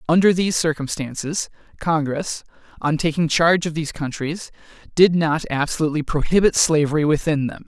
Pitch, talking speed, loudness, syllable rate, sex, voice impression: 160 Hz, 135 wpm, -20 LUFS, 5.6 syllables/s, male, very masculine, slightly middle-aged, slightly thick, very tensed, powerful, very bright, slightly hard, clear, very fluent, slightly raspy, cool, slightly intellectual, very refreshing, sincere, slightly calm, slightly mature, friendly, reassuring, very unique, slightly elegant, wild, slightly sweet, very lively, kind, intense, slightly light